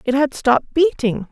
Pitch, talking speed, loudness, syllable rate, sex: 265 Hz, 185 wpm, -17 LUFS, 5.0 syllables/s, female